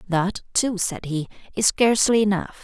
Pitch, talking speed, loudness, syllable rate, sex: 200 Hz, 160 wpm, -21 LUFS, 4.8 syllables/s, female